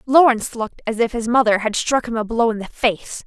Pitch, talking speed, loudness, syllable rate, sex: 230 Hz, 255 wpm, -19 LUFS, 5.9 syllables/s, female